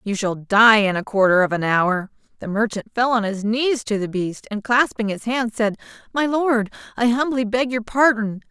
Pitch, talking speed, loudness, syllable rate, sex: 220 Hz, 210 wpm, -20 LUFS, 4.7 syllables/s, female